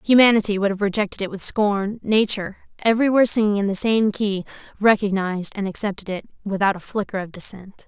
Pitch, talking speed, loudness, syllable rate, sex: 205 Hz, 175 wpm, -20 LUFS, 6.1 syllables/s, female